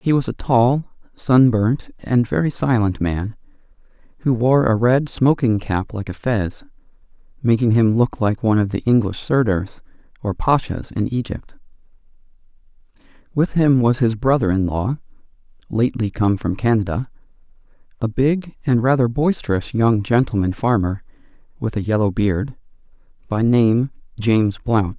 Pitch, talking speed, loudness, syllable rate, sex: 115 Hz, 140 wpm, -19 LUFS, 4.6 syllables/s, male